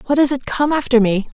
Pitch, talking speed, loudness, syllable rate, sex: 260 Hz, 260 wpm, -16 LUFS, 6.0 syllables/s, female